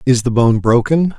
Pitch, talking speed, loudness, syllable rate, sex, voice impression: 125 Hz, 205 wpm, -14 LUFS, 4.7 syllables/s, male, masculine, very adult-like, slightly thick, cool, sincere, slightly elegant